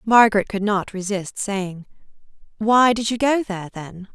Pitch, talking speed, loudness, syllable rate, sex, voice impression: 205 Hz, 160 wpm, -20 LUFS, 4.7 syllables/s, female, feminine, adult-like, tensed, powerful, bright, clear, fluent, intellectual, calm, friendly, elegant, lively, kind